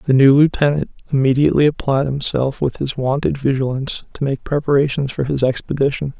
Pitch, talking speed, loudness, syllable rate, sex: 135 Hz, 155 wpm, -17 LUFS, 6.0 syllables/s, male